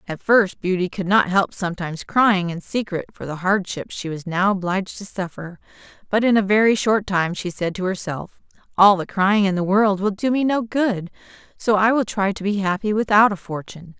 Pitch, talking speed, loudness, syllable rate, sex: 195 Hz, 215 wpm, -20 LUFS, 5.2 syllables/s, female